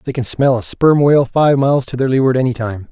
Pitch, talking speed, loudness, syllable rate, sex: 130 Hz, 265 wpm, -14 LUFS, 6.1 syllables/s, male